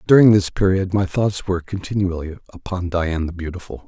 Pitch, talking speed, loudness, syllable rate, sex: 90 Hz, 170 wpm, -20 LUFS, 5.6 syllables/s, male